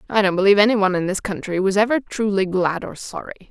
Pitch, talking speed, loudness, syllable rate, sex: 200 Hz, 240 wpm, -19 LUFS, 6.9 syllables/s, female